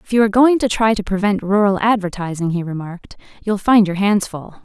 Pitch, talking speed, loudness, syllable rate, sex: 200 Hz, 220 wpm, -17 LUFS, 5.9 syllables/s, female